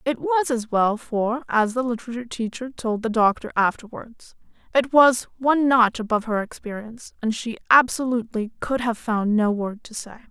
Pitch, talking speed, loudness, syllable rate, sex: 235 Hz, 175 wpm, -22 LUFS, 5.3 syllables/s, female